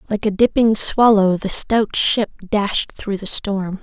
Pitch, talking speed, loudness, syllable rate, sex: 205 Hz, 170 wpm, -17 LUFS, 3.7 syllables/s, female